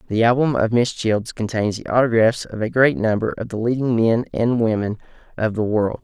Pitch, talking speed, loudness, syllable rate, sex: 115 Hz, 210 wpm, -19 LUFS, 5.3 syllables/s, male